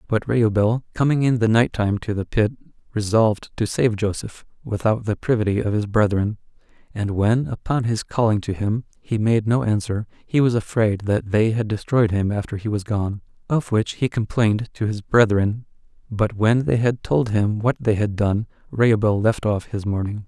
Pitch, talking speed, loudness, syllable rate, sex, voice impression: 110 Hz, 190 wpm, -21 LUFS, 4.9 syllables/s, male, very masculine, very adult-like, middle-aged, thick, slightly relaxed, slightly weak, dark, slightly soft, muffled, slightly fluent, cool, very intellectual, very sincere, very calm, slightly mature, friendly, reassuring, slightly unique, elegant, sweet, very kind, very modest